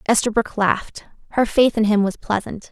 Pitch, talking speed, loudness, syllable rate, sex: 215 Hz, 175 wpm, -19 LUFS, 5.3 syllables/s, female